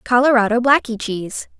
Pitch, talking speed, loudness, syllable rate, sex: 235 Hz, 115 wpm, -16 LUFS, 5.6 syllables/s, female